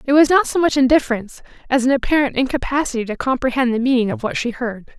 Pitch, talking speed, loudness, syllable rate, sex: 260 Hz, 215 wpm, -18 LUFS, 6.7 syllables/s, female